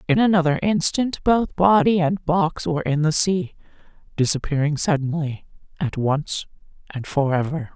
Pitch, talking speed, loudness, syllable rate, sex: 165 Hz, 125 wpm, -21 LUFS, 4.7 syllables/s, female